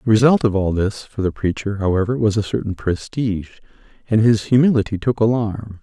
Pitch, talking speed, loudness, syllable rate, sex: 105 Hz, 185 wpm, -19 LUFS, 5.7 syllables/s, male